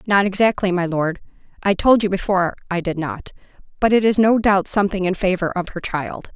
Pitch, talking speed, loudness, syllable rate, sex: 190 Hz, 200 wpm, -19 LUFS, 5.6 syllables/s, female